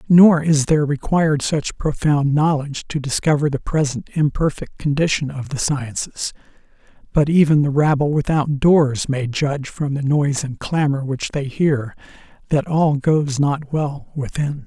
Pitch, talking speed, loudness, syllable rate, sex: 145 Hz, 155 wpm, -19 LUFS, 4.6 syllables/s, male